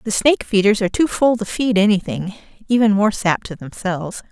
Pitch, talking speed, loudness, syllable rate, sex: 205 Hz, 180 wpm, -18 LUFS, 5.8 syllables/s, female